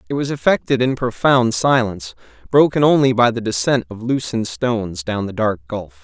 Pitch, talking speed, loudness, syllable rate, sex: 115 Hz, 180 wpm, -18 LUFS, 5.4 syllables/s, male